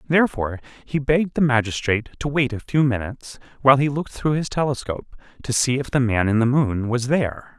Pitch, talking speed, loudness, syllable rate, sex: 130 Hz, 205 wpm, -21 LUFS, 6.4 syllables/s, male